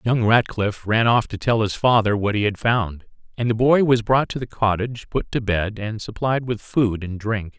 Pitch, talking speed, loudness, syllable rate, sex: 110 Hz, 230 wpm, -21 LUFS, 4.7 syllables/s, male